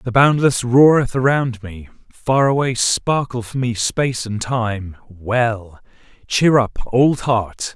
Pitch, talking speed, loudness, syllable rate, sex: 120 Hz, 130 wpm, -17 LUFS, 3.6 syllables/s, male